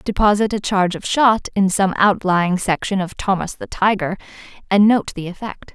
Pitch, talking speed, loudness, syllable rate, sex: 195 Hz, 175 wpm, -18 LUFS, 5.0 syllables/s, female